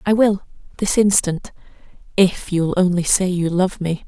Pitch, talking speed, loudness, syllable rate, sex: 185 Hz, 145 wpm, -18 LUFS, 4.4 syllables/s, female